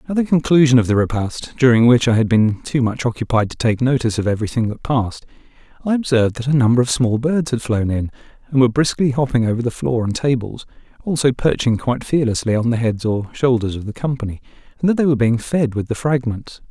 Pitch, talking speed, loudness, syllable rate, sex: 125 Hz, 225 wpm, -18 LUFS, 6.3 syllables/s, male